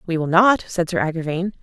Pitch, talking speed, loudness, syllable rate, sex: 175 Hz, 220 wpm, -19 LUFS, 5.8 syllables/s, female